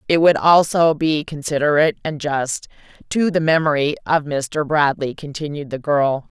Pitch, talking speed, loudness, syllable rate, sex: 150 Hz, 150 wpm, -18 LUFS, 4.7 syllables/s, female